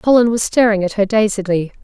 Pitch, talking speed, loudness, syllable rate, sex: 210 Hz, 195 wpm, -15 LUFS, 5.9 syllables/s, female